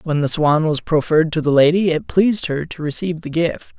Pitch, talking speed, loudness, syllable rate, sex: 160 Hz, 240 wpm, -17 LUFS, 5.9 syllables/s, male